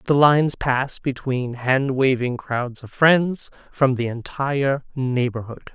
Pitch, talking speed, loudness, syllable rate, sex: 130 Hz, 135 wpm, -21 LUFS, 3.8 syllables/s, male